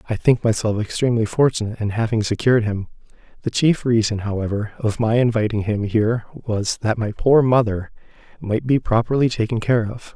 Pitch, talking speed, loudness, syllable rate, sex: 115 Hz, 170 wpm, -20 LUFS, 5.7 syllables/s, male